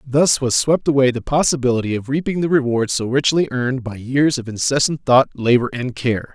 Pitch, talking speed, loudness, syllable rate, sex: 130 Hz, 200 wpm, -18 LUFS, 5.4 syllables/s, male